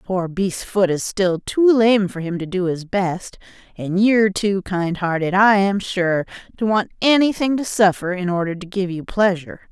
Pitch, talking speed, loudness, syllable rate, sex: 195 Hz, 205 wpm, -19 LUFS, 4.7 syllables/s, female